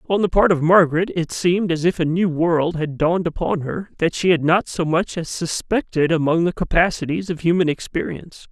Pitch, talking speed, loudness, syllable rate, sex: 170 Hz, 210 wpm, -19 LUFS, 5.4 syllables/s, male